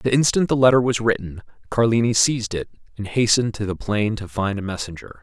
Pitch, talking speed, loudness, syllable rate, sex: 110 Hz, 205 wpm, -20 LUFS, 6.0 syllables/s, male